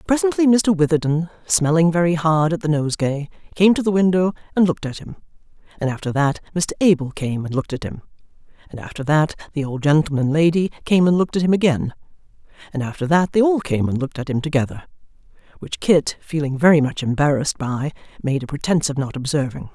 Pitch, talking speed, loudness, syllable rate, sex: 155 Hz, 200 wpm, -19 LUFS, 6.4 syllables/s, female